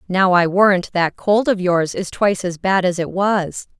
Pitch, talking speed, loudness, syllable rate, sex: 185 Hz, 220 wpm, -17 LUFS, 4.5 syllables/s, female